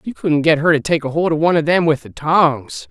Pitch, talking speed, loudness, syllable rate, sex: 155 Hz, 310 wpm, -16 LUFS, 5.7 syllables/s, male